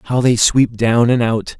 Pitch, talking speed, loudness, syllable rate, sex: 115 Hz, 225 wpm, -14 LUFS, 3.9 syllables/s, male